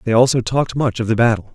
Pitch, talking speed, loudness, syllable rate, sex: 120 Hz, 270 wpm, -17 LUFS, 7.0 syllables/s, male